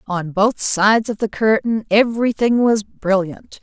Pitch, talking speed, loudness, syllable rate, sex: 210 Hz, 150 wpm, -17 LUFS, 4.3 syllables/s, female